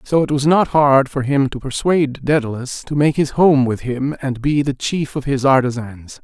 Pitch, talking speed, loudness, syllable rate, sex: 135 Hz, 220 wpm, -17 LUFS, 4.8 syllables/s, male